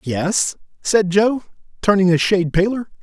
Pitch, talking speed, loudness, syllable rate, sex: 190 Hz, 140 wpm, -18 LUFS, 4.4 syllables/s, male